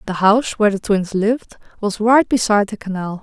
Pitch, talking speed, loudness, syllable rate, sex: 210 Hz, 205 wpm, -17 LUFS, 5.9 syllables/s, female